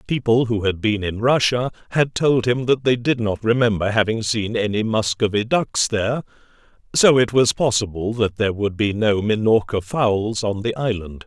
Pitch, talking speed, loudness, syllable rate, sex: 110 Hz, 180 wpm, -19 LUFS, 4.8 syllables/s, male